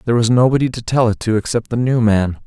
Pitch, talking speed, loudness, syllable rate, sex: 115 Hz, 270 wpm, -16 LUFS, 6.6 syllables/s, male